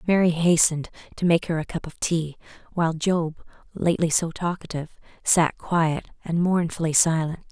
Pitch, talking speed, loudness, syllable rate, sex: 165 Hz, 150 wpm, -23 LUFS, 5.1 syllables/s, female